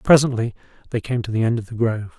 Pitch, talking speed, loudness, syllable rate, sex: 115 Hz, 245 wpm, -21 LUFS, 7.1 syllables/s, male